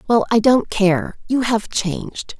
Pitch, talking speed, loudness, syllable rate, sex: 210 Hz, 175 wpm, -18 LUFS, 3.9 syllables/s, female